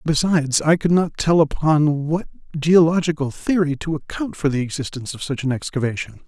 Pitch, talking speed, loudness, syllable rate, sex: 155 Hz, 170 wpm, -20 LUFS, 5.5 syllables/s, male